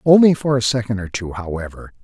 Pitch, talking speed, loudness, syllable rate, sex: 120 Hz, 205 wpm, -18 LUFS, 5.9 syllables/s, male